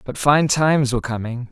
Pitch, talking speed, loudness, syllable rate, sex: 130 Hz, 200 wpm, -18 LUFS, 5.7 syllables/s, male